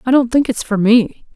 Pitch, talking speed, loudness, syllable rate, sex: 235 Hz, 265 wpm, -14 LUFS, 5.1 syllables/s, female